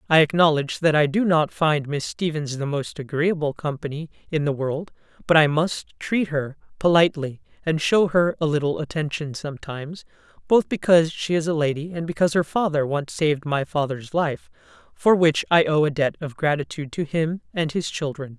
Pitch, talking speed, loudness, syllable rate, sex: 155 Hz, 185 wpm, -22 LUFS, 5.4 syllables/s, female